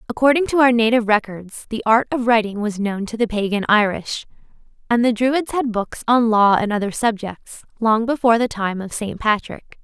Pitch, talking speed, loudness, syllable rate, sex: 225 Hz, 195 wpm, -18 LUFS, 5.3 syllables/s, female